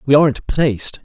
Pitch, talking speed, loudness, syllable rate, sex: 130 Hz, 175 wpm, -16 LUFS, 5.5 syllables/s, male